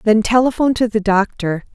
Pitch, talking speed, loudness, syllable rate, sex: 220 Hz, 170 wpm, -16 LUFS, 5.8 syllables/s, female